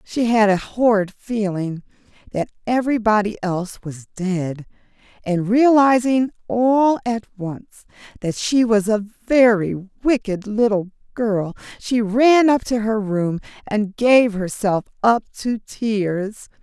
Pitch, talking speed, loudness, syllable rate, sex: 215 Hz, 125 wpm, -19 LUFS, 3.7 syllables/s, female